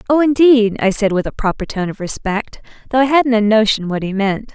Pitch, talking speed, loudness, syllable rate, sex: 225 Hz, 240 wpm, -15 LUFS, 5.5 syllables/s, female